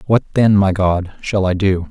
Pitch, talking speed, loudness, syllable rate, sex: 100 Hz, 220 wpm, -16 LUFS, 4.4 syllables/s, male